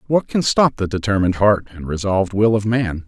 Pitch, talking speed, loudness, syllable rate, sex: 105 Hz, 215 wpm, -18 LUFS, 5.6 syllables/s, male